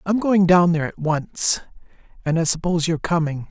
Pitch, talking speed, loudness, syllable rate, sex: 170 Hz, 190 wpm, -20 LUFS, 5.8 syllables/s, male